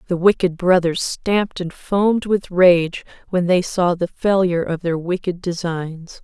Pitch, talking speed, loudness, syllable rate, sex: 180 Hz, 165 wpm, -19 LUFS, 4.3 syllables/s, female